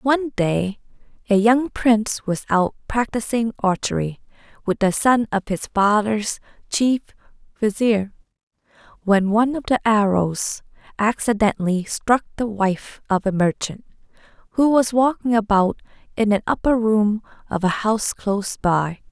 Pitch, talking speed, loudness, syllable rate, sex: 215 Hz, 130 wpm, -20 LUFS, 4.4 syllables/s, female